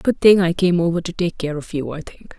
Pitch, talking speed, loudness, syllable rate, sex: 175 Hz, 300 wpm, -19 LUFS, 5.6 syllables/s, female